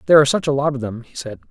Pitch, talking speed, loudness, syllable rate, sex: 135 Hz, 360 wpm, -18 LUFS, 8.7 syllables/s, male